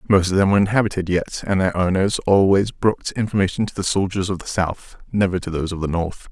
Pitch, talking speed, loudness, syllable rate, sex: 95 Hz, 230 wpm, -20 LUFS, 6.0 syllables/s, male